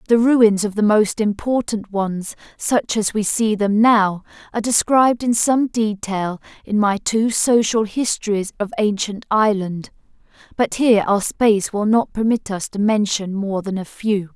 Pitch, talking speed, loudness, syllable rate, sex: 210 Hz, 160 wpm, -18 LUFS, 4.5 syllables/s, female